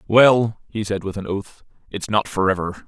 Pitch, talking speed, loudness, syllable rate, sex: 105 Hz, 190 wpm, -20 LUFS, 4.8 syllables/s, male